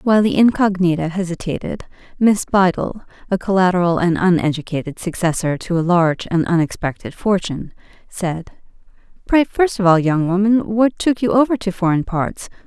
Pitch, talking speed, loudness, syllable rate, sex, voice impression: 185 Hz, 145 wpm, -17 LUFS, 5.2 syllables/s, female, feminine, very adult-like, slightly soft, intellectual, calm, elegant